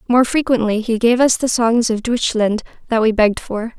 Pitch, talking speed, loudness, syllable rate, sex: 230 Hz, 205 wpm, -16 LUFS, 5.2 syllables/s, female